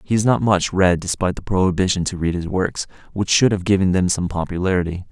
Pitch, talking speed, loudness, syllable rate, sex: 95 Hz, 225 wpm, -19 LUFS, 6.2 syllables/s, male